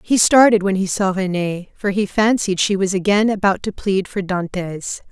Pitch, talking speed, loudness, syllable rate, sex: 195 Hz, 200 wpm, -18 LUFS, 4.7 syllables/s, female